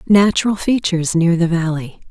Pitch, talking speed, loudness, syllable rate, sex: 180 Hz, 145 wpm, -16 LUFS, 5.4 syllables/s, female